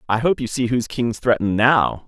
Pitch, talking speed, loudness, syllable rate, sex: 120 Hz, 230 wpm, -19 LUFS, 5.8 syllables/s, male